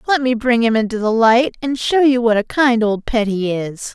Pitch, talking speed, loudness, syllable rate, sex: 235 Hz, 260 wpm, -16 LUFS, 4.8 syllables/s, female